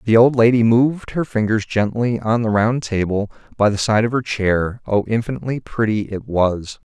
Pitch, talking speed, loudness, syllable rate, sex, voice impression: 110 Hz, 190 wpm, -18 LUFS, 5.0 syllables/s, male, very masculine, very adult-like, very middle-aged, very thick, tensed, very powerful, slightly dark, soft, clear, fluent, slightly raspy, cool, very intellectual, sincere, calm, friendly, very reassuring, unique, slightly elegant, slightly wild, slightly sweet, lively, kind, slightly modest